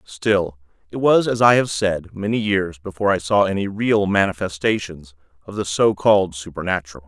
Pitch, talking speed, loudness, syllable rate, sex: 95 Hz, 160 wpm, -19 LUFS, 5.2 syllables/s, male